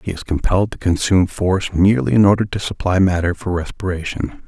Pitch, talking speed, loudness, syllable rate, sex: 95 Hz, 190 wpm, -18 LUFS, 6.2 syllables/s, male